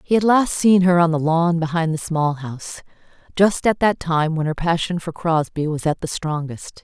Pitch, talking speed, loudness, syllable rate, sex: 165 Hz, 220 wpm, -19 LUFS, 4.8 syllables/s, female